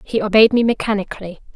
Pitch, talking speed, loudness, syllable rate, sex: 210 Hz, 155 wpm, -16 LUFS, 6.8 syllables/s, female